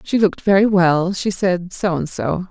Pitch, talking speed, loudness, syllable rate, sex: 185 Hz, 215 wpm, -17 LUFS, 4.6 syllables/s, female